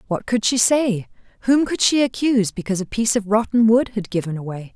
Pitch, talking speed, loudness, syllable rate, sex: 220 Hz, 215 wpm, -19 LUFS, 6.0 syllables/s, female